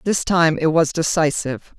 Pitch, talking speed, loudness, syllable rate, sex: 160 Hz, 170 wpm, -18 LUFS, 4.8 syllables/s, female